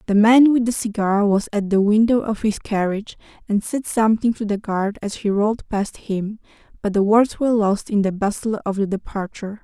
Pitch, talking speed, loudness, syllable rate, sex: 210 Hz, 210 wpm, -20 LUFS, 5.4 syllables/s, female